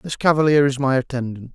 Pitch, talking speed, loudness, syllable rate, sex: 135 Hz, 195 wpm, -19 LUFS, 6.0 syllables/s, male